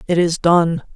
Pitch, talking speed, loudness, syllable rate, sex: 170 Hz, 190 wpm, -16 LUFS, 4.2 syllables/s, female